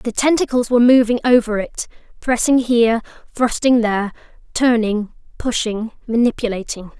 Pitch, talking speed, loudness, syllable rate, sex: 235 Hz, 105 wpm, -17 LUFS, 5.1 syllables/s, female